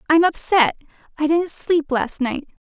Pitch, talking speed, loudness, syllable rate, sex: 305 Hz, 155 wpm, -19 LUFS, 4.3 syllables/s, female